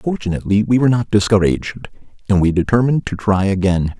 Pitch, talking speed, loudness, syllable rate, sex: 105 Hz, 165 wpm, -16 LUFS, 6.6 syllables/s, male